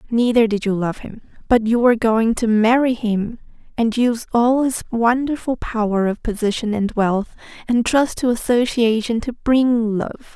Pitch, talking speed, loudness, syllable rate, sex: 230 Hz, 170 wpm, -18 LUFS, 4.5 syllables/s, female